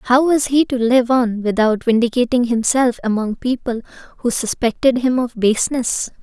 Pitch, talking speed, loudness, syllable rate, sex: 240 Hz, 155 wpm, -17 LUFS, 4.8 syllables/s, female